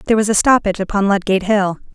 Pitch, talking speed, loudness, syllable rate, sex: 200 Hz, 215 wpm, -16 LUFS, 7.9 syllables/s, female